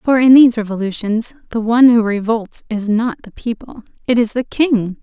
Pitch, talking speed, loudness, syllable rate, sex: 230 Hz, 190 wpm, -15 LUFS, 5.2 syllables/s, female